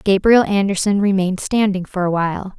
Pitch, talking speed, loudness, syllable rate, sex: 195 Hz, 160 wpm, -17 LUFS, 5.6 syllables/s, female